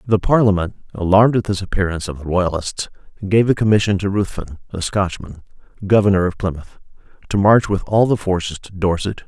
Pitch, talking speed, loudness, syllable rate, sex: 95 Hz, 175 wpm, -18 LUFS, 5.8 syllables/s, male